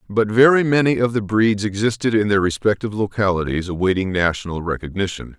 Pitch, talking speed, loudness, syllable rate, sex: 105 Hz, 155 wpm, -19 LUFS, 6.0 syllables/s, male